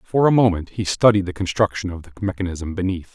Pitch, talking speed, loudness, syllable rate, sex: 95 Hz, 210 wpm, -20 LUFS, 6.1 syllables/s, male